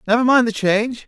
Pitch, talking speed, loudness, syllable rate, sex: 230 Hz, 225 wpm, -17 LUFS, 6.6 syllables/s, male